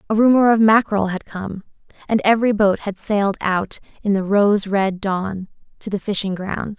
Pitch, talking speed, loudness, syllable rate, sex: 205 Hz, 185 wpm, -19 LUFS, 4.9 syllables/s, female